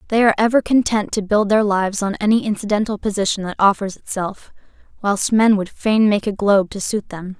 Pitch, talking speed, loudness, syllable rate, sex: 205 Hz, 205 wpm, -18 LUFS, 5.8 syllables/s, female